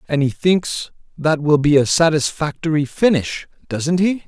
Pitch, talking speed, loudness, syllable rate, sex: 155 Hz, 155 wpm, -18 LUFS, 4.4 syllables/s, male